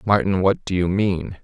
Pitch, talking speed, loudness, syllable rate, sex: 95 Hz, 170 wpm, -20 LUFS, 4.5 syllables/s, male